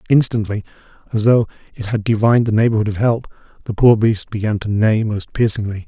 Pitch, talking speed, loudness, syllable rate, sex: 110 Hz, 185 wpm, -17 LUFS, 6.0 syllables/s, male